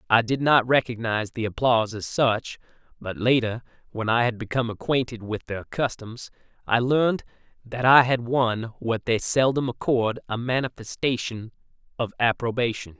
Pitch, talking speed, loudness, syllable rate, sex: 120 Hz, 150 wpm, -24 LUFS, 4.9 syllables/s, male